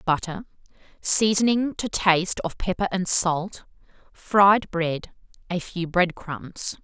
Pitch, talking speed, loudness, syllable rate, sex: 185 Hz, 125 wpm, -23 LUFS, 3.6 syllables/s, female